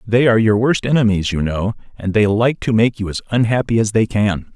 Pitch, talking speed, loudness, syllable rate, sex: 110 Hz, 235 wpm, -16 LUFS, 5.7 syllables/s, male